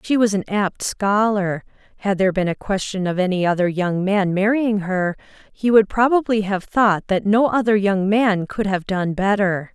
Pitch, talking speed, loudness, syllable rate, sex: 200 Hz, 190 wpm, -19 LUFS, 4.7 syllables/s, female